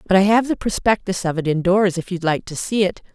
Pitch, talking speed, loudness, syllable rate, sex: 190 Hz, 265 wpm, -19 LUFS, 5.9 syllables/s, female